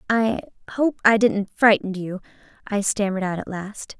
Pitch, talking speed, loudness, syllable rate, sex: 205 Hz, 165 wpm, -21 LUFS, 4.9 syllables/s, female